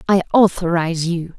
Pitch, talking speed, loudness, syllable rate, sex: 175 Hz, 130 wpm, -17 LUFS, 5.5 syllables/s, female